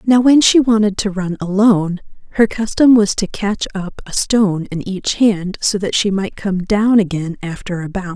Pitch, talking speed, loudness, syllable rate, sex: 200 Hz, 205 wpm, -16 LUFS, 4.7 syllables/s, female